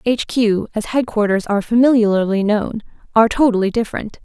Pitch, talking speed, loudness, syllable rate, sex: 220 Hz, 115 wpm, -17 LUFS, 5.3 syllables/s, female